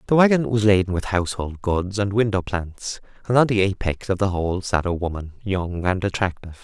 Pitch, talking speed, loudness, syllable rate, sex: 95 Hz, 210 wpm, -22 LUFS, 5.6 syllables/s, male